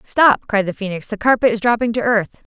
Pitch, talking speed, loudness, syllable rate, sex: 220 Hz, 230 wpm, -17 LUFS, 5.8 syllables/s, female